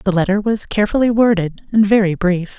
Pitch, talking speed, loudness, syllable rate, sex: 200 Hz, 185 wpm, -16 LUFS, 5.8 syllables/s, female